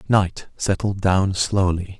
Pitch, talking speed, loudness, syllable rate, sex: 95 Hz, 120 wpm, -21 LUFS, 3.4 syllables/s, male